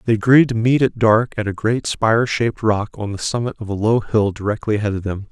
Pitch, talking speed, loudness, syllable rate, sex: 110 Hz, 260 wpm, -18 LUFS, 5.9 syllables/s, male